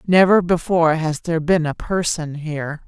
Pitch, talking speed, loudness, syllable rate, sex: 165 Hz, 165 wpm, -19 LUFS, 5.2 syllables/s, female